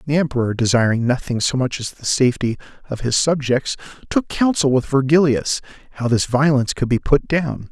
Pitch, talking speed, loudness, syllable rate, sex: 135 Hz, 180 wpm, -18 LUFS, 5.5 syllables/s, male